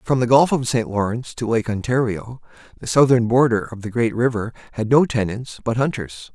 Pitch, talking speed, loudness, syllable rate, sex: 120 Hz, 200 wpm, -20 LUFS, 5.4 syllables/s, male